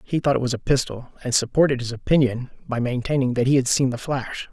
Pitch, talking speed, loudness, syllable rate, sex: 130 Hz, 240 wpm, -22 LUFS, 6.0 syllables/s, male